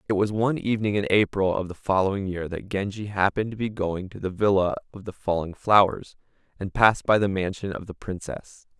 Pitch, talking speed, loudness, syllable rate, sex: 100 Hz, 210 wpm, -24 LUFS, 5.8 syllables/s, male